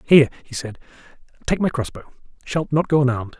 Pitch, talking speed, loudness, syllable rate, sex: 140 Hz, 195 wpm, -21 LUFS, 6.4 syllables/s, male